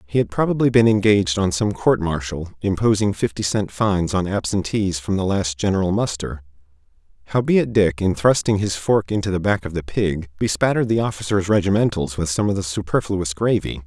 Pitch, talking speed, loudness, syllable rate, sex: 95 Hz, 180 wpm, -20 LUFS, 5.5 syllables/s, male